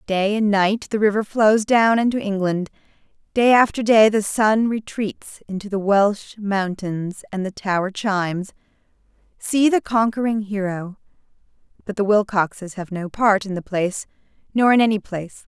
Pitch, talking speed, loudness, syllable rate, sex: 205 Hz, 155 wpm, -20 LUFS, 4.7 syllables/s, female